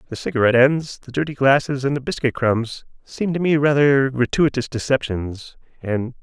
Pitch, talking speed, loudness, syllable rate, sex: 130 Hz, 165 wpm, -19 LUFS, 5.1 syllables/s, male